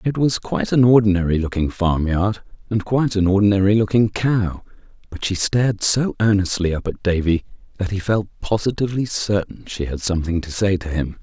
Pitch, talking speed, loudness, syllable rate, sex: 100 Hz, 180 wpm, -19 LUFS, 5.6 syllables/s, male